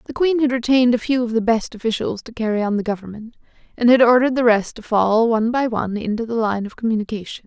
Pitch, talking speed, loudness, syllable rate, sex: 230 Hz, 240 wpm, -19 LUFS, 6.6 syllables/s, female